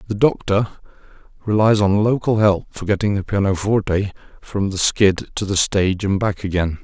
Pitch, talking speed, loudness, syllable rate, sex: 100 Hz, 165 wpm, -19 LUFS, 5.0 syllables/s, male